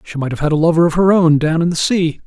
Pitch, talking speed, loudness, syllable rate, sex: 165 Hz, 345 wpm, -14 LUFS, 6.5 syllables/s, male